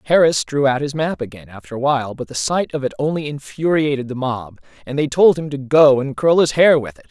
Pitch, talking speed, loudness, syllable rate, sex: 135 Hz, 255 wpm, -17 LUFS, 5.8 syllables/s, male